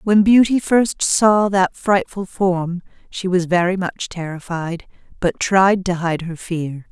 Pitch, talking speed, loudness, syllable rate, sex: 185 Hz, 155 wpm, -18 LUFS, 3.7 syllables/s, female